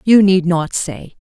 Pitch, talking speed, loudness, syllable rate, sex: 180 Hz, 195 wpm, -14 LUFS, 3.7 syllables/s, female